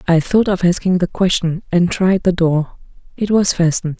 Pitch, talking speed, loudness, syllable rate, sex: 180 Hz, 195 wpm, -16 LUFS, 5.0 syllables/s, female